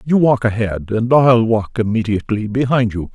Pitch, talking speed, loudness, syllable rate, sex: 115 Hz, 170 wpm, -16 LUFS, 5.0 syllables/s, male